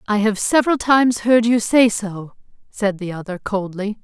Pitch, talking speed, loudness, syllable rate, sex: 215 Hz, 180 wpm, -18 LUFS, 4.8 syllables/s, female